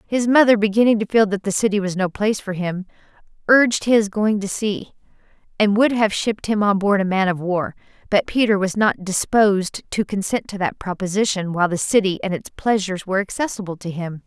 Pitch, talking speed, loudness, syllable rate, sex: 200 Hz, 205 wpm, -19 LUFS, 5.8 syllables/s, female